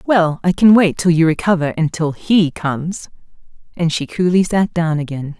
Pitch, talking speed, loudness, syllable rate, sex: 170 Hz, 190 wpm, -16 LUFS, 4.8 syllables/s, female